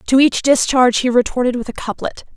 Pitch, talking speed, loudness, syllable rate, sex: 250 Hz, 205 wpm, -16 LUFS, 6.0 syllables/s, female